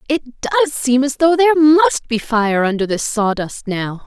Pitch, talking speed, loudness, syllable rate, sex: 255 Hz, 190 wpm, -16 LUFS, 4.1 syllables/s, female